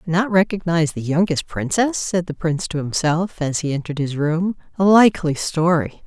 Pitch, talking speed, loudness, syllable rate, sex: 170 Hz, 180 wpm, -19 LUFS, 5.2 syllables/s, female